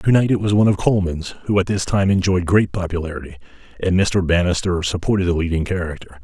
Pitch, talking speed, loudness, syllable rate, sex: 90 Hz, 200 wpm, -19 LUFS, 6.3 syllables/s, male